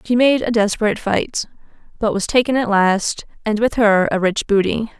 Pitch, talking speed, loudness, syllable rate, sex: 215 Hz, 190 wpm, -17 LUFS, 5.2 syllables/s, female